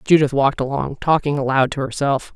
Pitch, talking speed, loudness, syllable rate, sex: 135 Hz, 180 wpm, -19 LUFS, 5.8 syllables/s, female